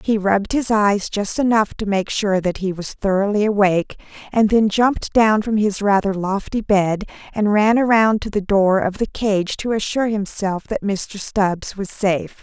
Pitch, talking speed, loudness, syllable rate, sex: 205 Hz, 195 wpm, -18 LUFS, 4.7 syllables/s, female